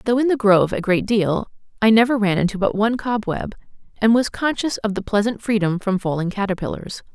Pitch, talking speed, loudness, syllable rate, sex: 210 Hz, 200 wpm, -20 LUFS, 5.8 syllables/s, female